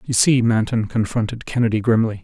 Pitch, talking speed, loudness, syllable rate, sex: 115 Hz, 160 wpm, -19 LUFS, 5.6 syllables/s, male